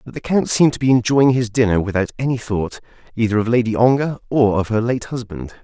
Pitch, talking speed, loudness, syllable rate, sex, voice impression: 115 Hz, 225 wpm, -18 LUFS, 6.0 syllables/s, male, masculine, adult-like, fluent, sincere, friendly, slightly lively